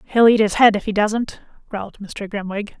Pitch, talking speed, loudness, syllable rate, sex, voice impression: 210 Hz, 215 wpm, -18 LUFS, 5.0 syllables/s, female, very feminine, slightly middle-aged, thin, slightly tensed, slightly weak, bright, slightly soft, very clear, very fluent, raspy, very cute, intellectual, very refreshing, sincere, very calm, friendly, reassuring, unique, very elegant, slightly wild, sweet, lively, kind, slightly intense, light